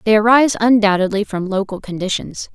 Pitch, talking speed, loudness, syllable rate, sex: 210 Hz, 140 wpm, -16 LUFS, 5.9 syllables/s, female